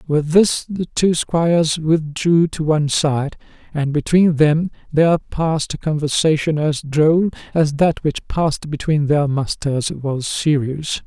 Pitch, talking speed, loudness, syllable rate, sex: 155 Hz, 145 wpm, -18 LUFS, 4.0 syllables/s, male